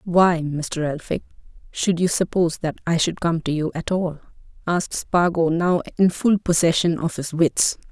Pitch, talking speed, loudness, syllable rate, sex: 170 Hz, 175 wpm, -21 LUFS, 4.6 syllables/s, female